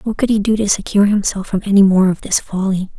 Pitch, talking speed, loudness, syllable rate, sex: 200 Hz, 260 wpm, -15 LUFS, 6.4 syllables/s, female